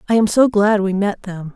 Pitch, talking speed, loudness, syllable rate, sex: 205 Hz, 270 wpm, -16 LUFS, 5.2 syllables/s, female